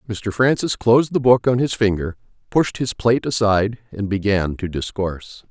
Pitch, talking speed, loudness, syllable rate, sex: 110 Hz, 175 wpm, -19 LUFS, 5.2 syllables/s, male